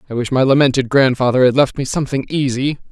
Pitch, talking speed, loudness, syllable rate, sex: 130 Hz, 205 wpm, -15 LUFS, 6.7 syllables/s, male